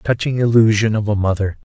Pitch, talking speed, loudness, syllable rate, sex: 110 Hz, 170 wpm, -16 LUFS, 5.7 syllables/s, male